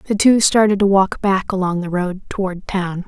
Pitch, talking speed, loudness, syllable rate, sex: 190 Hz, 215 wpm, -17 LUFS, 4.7 syllables/s, female